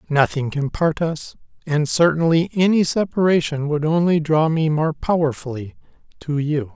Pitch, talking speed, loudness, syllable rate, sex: 155 Hz, 140 wpm, -19 LUFS, 4.7 syllables/s, male